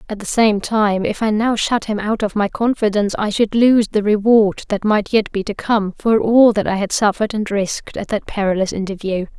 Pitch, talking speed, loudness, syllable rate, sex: 210 Hz, 230 wpm, -17 LUFS, 5.2 syllables/s, female